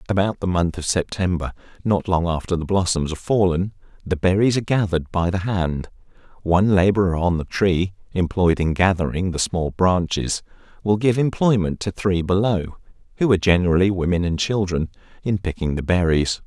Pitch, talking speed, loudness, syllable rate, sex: 90 Hz, 170 wpm, -21 LUFS, 4.8 syllables/s, male